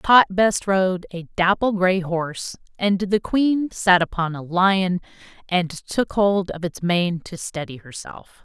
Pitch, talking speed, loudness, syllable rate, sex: 185 Hz, 155 wpm, -21 LUFS, 3.8 syllables/s, female